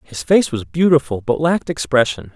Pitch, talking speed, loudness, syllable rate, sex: 140 Hz, 180 wpm, -17 LUFS, 5.3 syllables/s, male